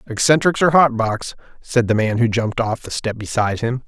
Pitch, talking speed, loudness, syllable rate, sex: 120 Hz, 215 wpm, -18 LUFS, 5.5 syllables/s, male